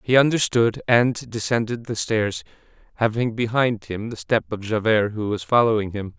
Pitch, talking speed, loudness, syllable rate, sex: 115 Hz, 165 wpm, -21 LUFS, 4.8 syllables/s, male